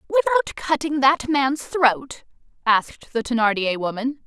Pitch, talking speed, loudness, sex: 270 Hz, 125 wpm, -21 LUFS, female